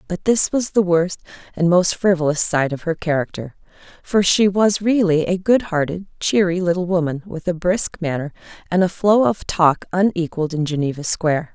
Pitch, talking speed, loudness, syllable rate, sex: 175 Hz, 180 wpm, -19 LUFS, 5.1 syllables/s, female